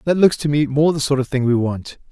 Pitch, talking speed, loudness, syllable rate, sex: 140 Hz, 310 wpm, -18 LUFS, 5.8 syllables/s, male